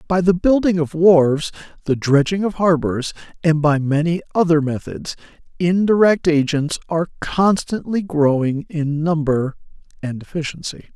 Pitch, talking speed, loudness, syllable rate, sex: 165 Hz, 125 wpm, -18 LUFS, 4.7 syllables/s, male